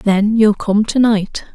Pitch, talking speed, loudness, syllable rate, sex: 210 Hz, 195 wpm, -14 LUFS, 3.5 syllables/s, female